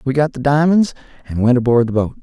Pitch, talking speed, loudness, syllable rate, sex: 135 Hz, 245 wpm, -15 LUFS, 6.2 syllables/s, male